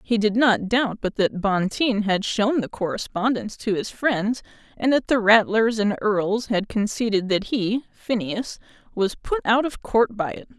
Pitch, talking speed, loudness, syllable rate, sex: 215 Hz, 180 wpm, -22 LUFS, 4.3 syllables/s, female